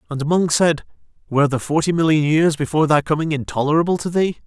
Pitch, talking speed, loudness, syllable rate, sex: 155 Hz, 190 wpm, -18 LUFS, 6.4 syllables/s, male